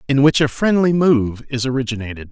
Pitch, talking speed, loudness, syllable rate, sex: 130 Hz, 180 wpm, -17 LUFS, 5.8 syllables/s, male